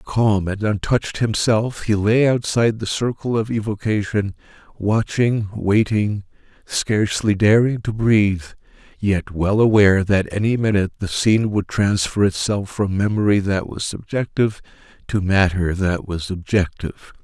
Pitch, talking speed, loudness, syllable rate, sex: 105 Hz, 130 wpm, -19 LUFS, 4.7 syllables/s, male